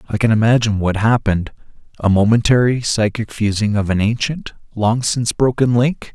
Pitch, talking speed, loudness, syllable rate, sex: 110 Hz, 155 wpm, -16 LUFS, 5.5 syllables/s, male